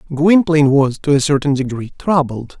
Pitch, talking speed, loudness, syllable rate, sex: 145 Hz, 160 wpm, -15 LUFS, 5.4 syllables/s, male